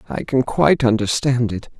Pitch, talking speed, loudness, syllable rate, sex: 115 Hz, 165 wpm, -18 LUFS, 5.2 syllables/s, male